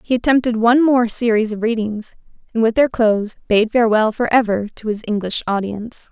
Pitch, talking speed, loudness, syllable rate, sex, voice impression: 225 Hz, 185 wpm, -17 LUFS, 5.7 syllables/s, female, very feminine, young, very thin, tensed, slightly powerful, very bright, hard, very clear, very fluent, very cute, slightly cool, intellectual, very refreshing, sincere, slightly calm, very friendly, very reassuring, unique, elegant, very sweet, very lively, slightly intense, slightly sharp, light